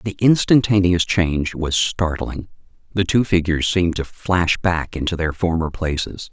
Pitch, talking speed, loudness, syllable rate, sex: 90 Hz, 150 wpm, -19 LUFS, 4.7 syllables/s, male